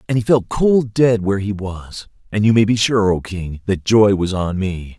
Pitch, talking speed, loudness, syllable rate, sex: 105 Hz, 240 wpm, -17 LUFS, 4.7 syllables/s, male